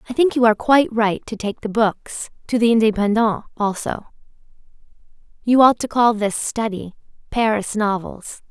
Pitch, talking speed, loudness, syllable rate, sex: 225 Hz, 155 wpm, -19 LUFS, 4.9 syllables/s, female